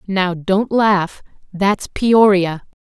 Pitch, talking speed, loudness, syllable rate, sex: 195 Hz, 85 wpm, -16 LUFS, 2.7 syllables/s, female